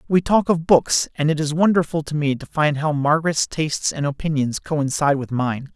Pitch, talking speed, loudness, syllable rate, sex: 150 Hz, 210 wpm, -20 LUFS, 5.3 syllables/s, male